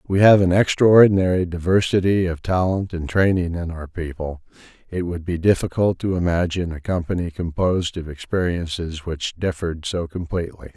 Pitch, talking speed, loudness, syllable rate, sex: 90 Hz, 150 wpm, -20 LUFS, 5.3 syllables/s, male